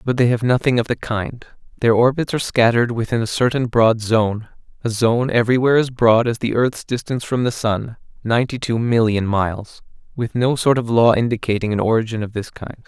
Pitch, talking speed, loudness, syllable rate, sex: 115 Hz, 190 wpm, -18 LUFS, 5.8 syllables/s, male